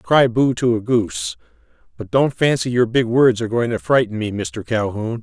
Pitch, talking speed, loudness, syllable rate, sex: 120 Hz, 205 wpm, -18 LUFS, 5.0 syllables/s, male